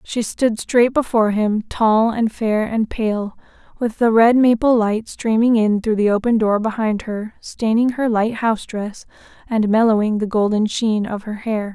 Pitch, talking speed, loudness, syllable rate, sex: 220 Hz, 185 wpm, -18 LUFS, 4.4 syllables/s, female